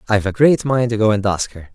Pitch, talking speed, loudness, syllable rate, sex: 110 Hz, 310 wpm, -17 LUFS, 6.4 syllables/s, male